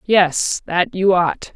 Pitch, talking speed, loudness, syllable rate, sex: 185 Hz, 155 wpm, -17 LUFS, 2.9 syllables/s, female